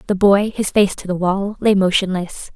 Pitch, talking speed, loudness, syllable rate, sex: 195 Hz, 210 wpm, -17 LUFS, 4.8 syllables/s, female